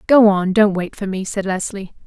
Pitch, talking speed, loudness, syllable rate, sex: 200 Hz, 230 wpm, -17 LUFS, 4.9 syllables/s, female